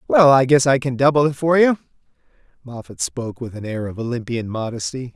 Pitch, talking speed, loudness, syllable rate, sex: 130 Hz, 200 wpm, -19 LUFS, 5.8 syllables/s, male